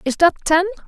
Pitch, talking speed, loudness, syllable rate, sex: 340 Hz, 205 wpm, -17 LUFS, 5.4 syllables/s, female